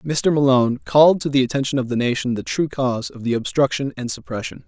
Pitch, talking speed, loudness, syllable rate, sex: 135 Hz, 220 wpm, -19 LUFS, 6.1 syllables/s, male